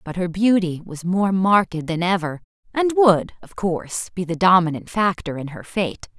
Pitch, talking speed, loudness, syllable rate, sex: 180 Hz, 185 wpm, -20 LUFS, 4.7 syllables/s, female